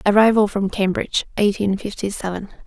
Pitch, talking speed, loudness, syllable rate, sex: 200 Hz, 135 wpm, -20 LUFS, 5.7 syllables/s, female